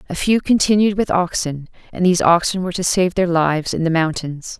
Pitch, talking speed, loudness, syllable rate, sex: 175 Hz, 210 wpm, -17 LUFS, 5.7 syllables/s, female